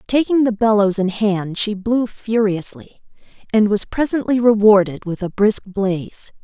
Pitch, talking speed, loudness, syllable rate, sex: 210 Hz, 150 wpm, -17 LUFS, 4.4 syllables/s, female